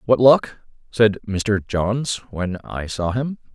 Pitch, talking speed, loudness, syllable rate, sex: 110 Hz, 150 wpm, -20 LUFS, 3.3 syllables/s, male